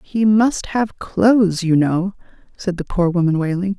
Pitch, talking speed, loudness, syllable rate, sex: 190 Hz, 175 wpm, -18 LUFS, 4.3 syllables/s, female